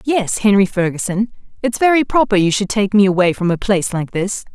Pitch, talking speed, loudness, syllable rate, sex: 205 Hz, 210 wpm, -16 LUFS, 5.7 syllables/s, female